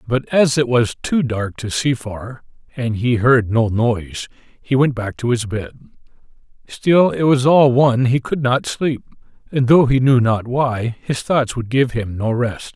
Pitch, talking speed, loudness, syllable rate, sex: 125 Hz, 200 wpm, -17 LUFS, 4.2 syllables/s, male